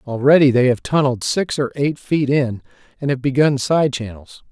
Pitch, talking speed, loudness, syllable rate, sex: 135 Hz, 185 wpm, -17 LUFS, 5.1 syllables/s, male